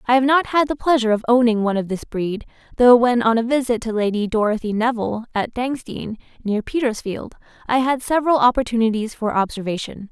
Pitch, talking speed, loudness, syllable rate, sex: 235 Hz, 185 wpm, -19 LUFS, 5.8 syllables/s, female